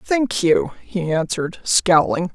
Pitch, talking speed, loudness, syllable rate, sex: 180 Hz, 130 wpm, -19 LUFS, 3.7 syllables/s, female